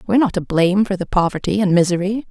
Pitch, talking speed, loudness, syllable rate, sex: 195 Hz, 235 wpm, -17 LUFS, 7.0 syllables/s, female